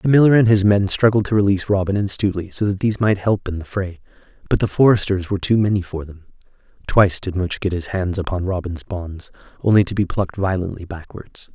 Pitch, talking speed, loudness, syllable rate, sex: 95 Hz, 220 wpm, -19 LUFS, 6.2 syllables/s, male